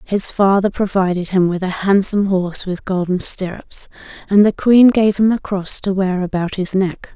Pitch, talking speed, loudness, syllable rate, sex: 190 Hz, 195 wpm, -16 LUFS, 4.8 syllables/s, female